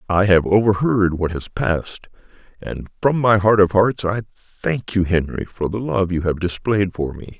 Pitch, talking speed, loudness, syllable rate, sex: 95 Hz, 195 wpm, -19 LUFS, 4.5 syllables/s, male